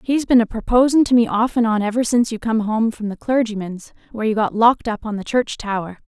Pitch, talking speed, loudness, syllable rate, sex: 225 Hz, 255 wpm, -18 LUFS, 6.1 syllables/s, female